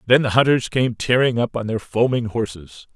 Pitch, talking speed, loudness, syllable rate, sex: 115 Hz, 205 wpm, -19 LUFS, 5.1 syllables/s, male